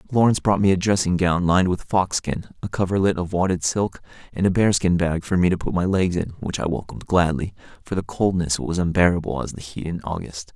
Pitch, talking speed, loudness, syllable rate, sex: 90 Hz, 225 wpm, -22 LUFS, 5.9 syllables/s, male